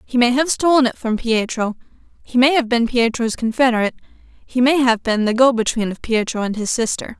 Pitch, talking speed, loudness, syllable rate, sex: 240 Hz, 210 wpm, -18 LUFS, 5.7 syllables/s, female